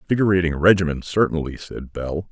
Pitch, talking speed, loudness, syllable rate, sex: 85 Hz, 130 wpm, -20 LUFS, 6.3 syllables/s, male